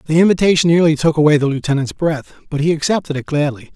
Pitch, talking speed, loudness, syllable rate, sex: 155 Hz, 210 wpm, -15 LUFS, 6.7 syllables/s, male